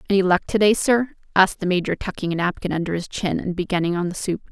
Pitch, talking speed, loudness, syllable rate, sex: 185 Hz, 240 wpm, -21 LUFS, 6.6 syllables/s, female